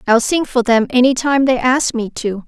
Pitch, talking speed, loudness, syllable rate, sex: 245 Hz, 245 wpm, -15 LUFS, 4.8 syllables/s, female